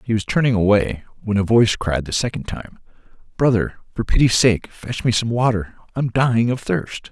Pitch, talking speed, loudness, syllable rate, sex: 110 Hz, 195 wpm, -19 LUFS, 5.3 syllables/s, male